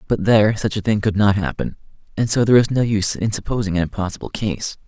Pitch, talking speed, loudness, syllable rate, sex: 105 Hz, 235 wpm, -19 LUFS, 6.6 syllables/s, male